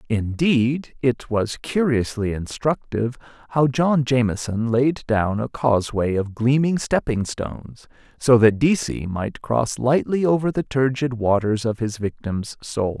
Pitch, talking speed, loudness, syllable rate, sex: 125 Hz, 140 wpm, -21 LUFS, 4.1 syllables/s, male